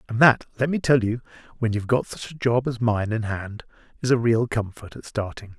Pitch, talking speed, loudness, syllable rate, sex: 115 Hz, 245 wpm, -23 LUFS, 5.5 syllables/s, male